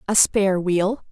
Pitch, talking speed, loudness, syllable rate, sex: 195 Hz, 160 wpm, -19 LUFS, 4.4 syllables/s, female